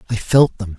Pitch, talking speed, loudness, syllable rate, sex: 105 Hz, 230 wpm, -16 LUFS, 5.5 syllables/s, male